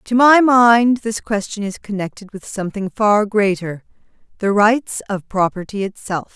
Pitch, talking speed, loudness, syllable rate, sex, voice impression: 210 Hz, 150 wpm, -17 LUFS, 4.5 syllables/s, female, feminine, adult-like, tensed, powerful, slightly bright, soft, clear, intellectual, calm, friendly, reassuring, elegant, lively, slightly sharp